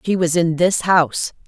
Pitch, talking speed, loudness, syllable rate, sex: 170 Hz, 205 wpm, -17 LUFS, 4.8 syllables/s, female